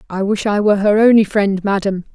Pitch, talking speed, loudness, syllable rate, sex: 205 Hz, 225 wpm, -15 LUFS, 5.8 syllables/s, female